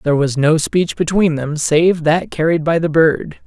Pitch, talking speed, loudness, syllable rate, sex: 160 Hz, 210 wpm, -15 LUFS, 4.6 syllables/s, male